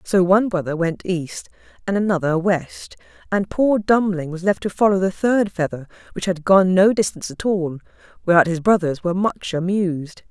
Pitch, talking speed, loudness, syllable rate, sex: 185 Hz, 180 wpm, -19 LUFS, 5.2 syllables/s, female